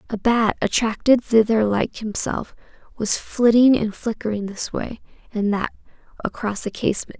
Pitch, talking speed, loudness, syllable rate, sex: 220 Hz, 140 wpm, -21 LUFS, 4.6 syllables/s, female